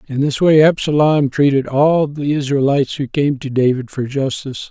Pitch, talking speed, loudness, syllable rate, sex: 140 Hz, 180 wpm, -16 LUFS, 5.1 syllables/s, male